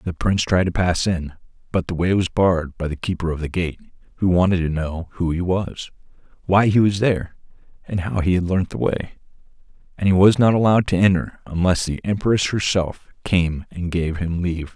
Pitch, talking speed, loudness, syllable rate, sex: 90 Hz, 205 wpm, -20 LUFS, 5.4 syllables/s, male